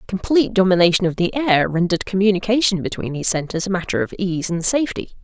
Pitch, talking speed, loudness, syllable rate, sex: 190 Hz, 185 wpm, -19 LUFS, 6.6 syllables/s, female